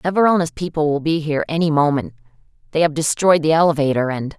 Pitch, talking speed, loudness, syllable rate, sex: 155 Hz, 180 wpm, -18 LUFS, 6.5 syllables/s, female